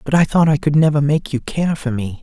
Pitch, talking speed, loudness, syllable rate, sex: 145 Hz, 295 wpm, -17 LUFS, 5.6 syllables/s, male